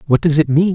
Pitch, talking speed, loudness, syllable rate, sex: 160 Hz, 320 wpm, -14 LUFS, 6.3 syllables/s, male